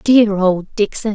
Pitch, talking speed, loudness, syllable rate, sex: 205 Hz, 155 wpm, -15 LUFS, 3.7 syllables/s, female